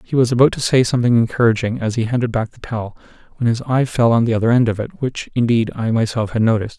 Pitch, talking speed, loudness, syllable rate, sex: 115 Hz, 255 wpm, -17 LUFS, 6.8 syllables/s, male